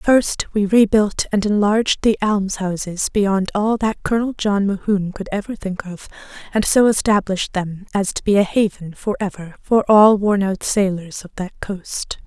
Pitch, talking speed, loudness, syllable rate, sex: 200 Hz, 175 wpm, -18 LUFS, 4.6 syllables/s, female